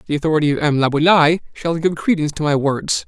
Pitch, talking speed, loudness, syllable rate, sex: 155 Hz, 215 wpm, -17 LUFS, 6.5 syllables/s, male